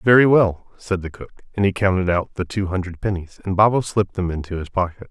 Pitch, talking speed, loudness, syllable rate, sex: 95 Hz, 235 wpm, -20 LUFS, 5.9 syllables/s, male